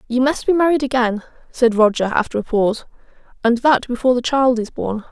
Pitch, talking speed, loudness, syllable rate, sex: 245 Hz, 200 wpm, -17 LUFS, 5.9 syllables/s, female